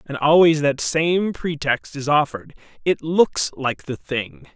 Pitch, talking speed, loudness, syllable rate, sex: 145 Hz, 145 wpm, -20 LUFS, 4.0 syllables/s, male